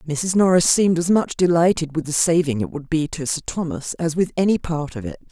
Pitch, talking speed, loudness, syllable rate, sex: 160 Hz, 235 wpm, -20 LUFS, 5.7 syllables/s, female